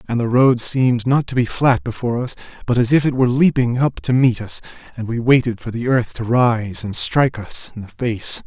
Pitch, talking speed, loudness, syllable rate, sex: 120 Hz, 240 wpm, -18 LUFS, 5.4 syllables/s, male